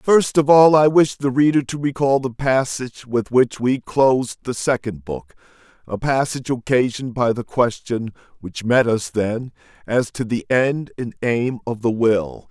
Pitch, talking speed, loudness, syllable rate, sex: 125 Hz, 175 wpm, -19 LUFS, 4.5 syllables/s, male